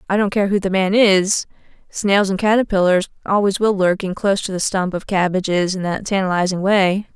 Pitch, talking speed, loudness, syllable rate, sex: 195 Hz, 200 wpm, -17 LUFS, 5.4 syllables/s, female